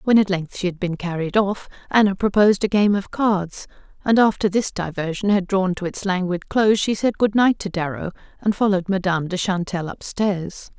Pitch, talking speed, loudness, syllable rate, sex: 195 Hz, 200 wpm, -20 LUFS, 5.4 syllables/s, female